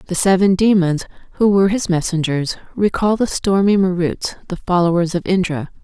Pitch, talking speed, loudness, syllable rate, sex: 185 Hz, 155 wpm, -17 LUFS, 5.3 syllables/s, female